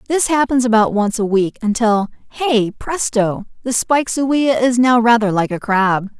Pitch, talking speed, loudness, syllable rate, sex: 230 Hz, 175 wpm, -16 LUFS, 4.4 syllables/s, female